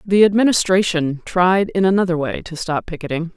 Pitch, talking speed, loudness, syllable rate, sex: 175 Hz, 160 wpm, -17 LUFS, 5.3 syllables/s, female